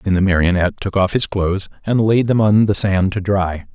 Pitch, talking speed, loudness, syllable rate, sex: 95 Hz, 240 wpm, -17 LUFS, 5.7 syllables/s, male